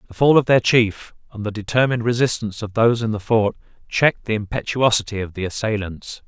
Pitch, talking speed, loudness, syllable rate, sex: 110 Hz, 190 wpm, -19 LUFS, 6.1 syllables/s, male